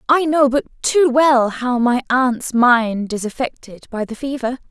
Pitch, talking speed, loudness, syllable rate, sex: 255 Hz, 180 wpm, -17 LUFS, 4.2 syllables/s, female